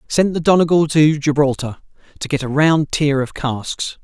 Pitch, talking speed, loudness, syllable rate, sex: 150 Hz, 180 wpm, -17 LUFS, 4.6 syllables/s, male